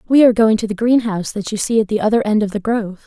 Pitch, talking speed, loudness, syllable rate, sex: 215 Hz, 315 wpm, -16 LUFS, 7.2 syllables/s, female